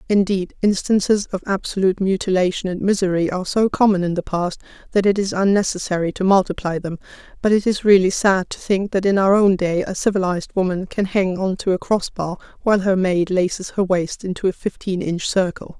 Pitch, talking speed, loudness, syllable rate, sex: 190 Hz, 200 wpm, -19 LUFS, 5.7 syllables/s, female